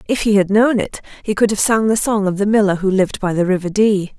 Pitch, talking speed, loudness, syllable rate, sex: 205 Hz, 285 wpm, -16 LUFS, 6.0 syllables/s, female